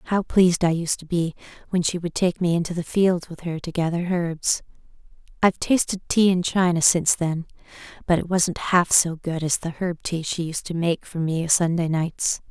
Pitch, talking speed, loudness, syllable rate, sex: 170 Hz, 215 wpm, -22 LUFS, 5.0 syllables/s, female